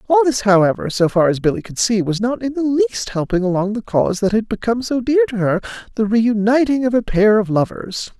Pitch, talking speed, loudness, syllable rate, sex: 220 Hz, 225 wpm, -17 LUFS, 5.6 syllables/s, female